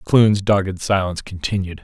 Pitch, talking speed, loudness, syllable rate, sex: 95 Hz, 130 wpm, -19 LUFS, 5.5 syllables/s, male